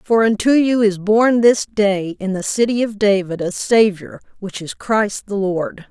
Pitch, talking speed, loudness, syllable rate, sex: 210 Hz, 195 wpm, -17 LUFS, 4.1 syllables/s, female